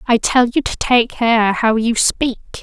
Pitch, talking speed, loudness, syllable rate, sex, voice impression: 235 Hz, 205 wpm, -15 LUFS, 4.0 syllables/s, female, feminine, adult-like, tensed, slightly weak, slightly dark, clear, fluent, intellectual, calm, slightly lively, slightly sharp, modest